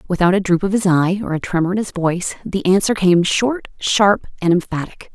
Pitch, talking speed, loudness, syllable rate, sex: 185 Hz, 220 wpm, -17 LUFS, 5.4 syllables/s, female